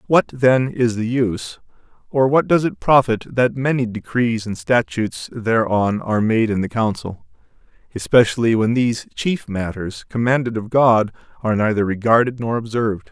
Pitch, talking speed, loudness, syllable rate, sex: 115 Hz, 155 wpm, -19 LUFS, 5.0 syllables/s, male